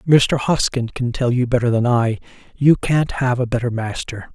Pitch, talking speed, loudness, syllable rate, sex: 125 Hz, 195 wpm, -18 LUFS, 4.8 syllables/s, male